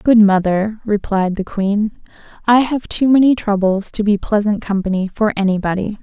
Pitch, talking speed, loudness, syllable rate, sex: 210 Hz, 160 wpm, -16 LUFS, 4.8 syllables/s, female